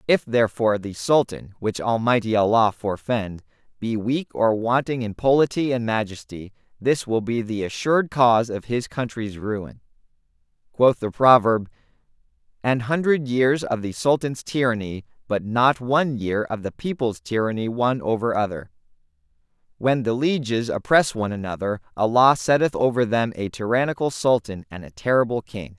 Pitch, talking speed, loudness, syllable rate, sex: 115 Hz, 150 wpm, -22 LUFS, 4.7 syllables/s, male